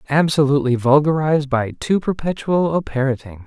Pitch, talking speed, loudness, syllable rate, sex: 145 Hz, 120 wpm, -18 LUFS, 5.5 syllables/s, male